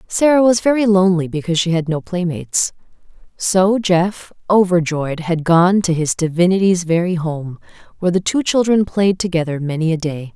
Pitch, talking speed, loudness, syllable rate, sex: 180 Hz, 160 wpm, -16 LUFS, 5.2 syllables/s, female